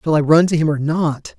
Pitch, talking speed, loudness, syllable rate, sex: 155 Hz, 300 wpm, -16 LUFS, 5.4 syllables/s, male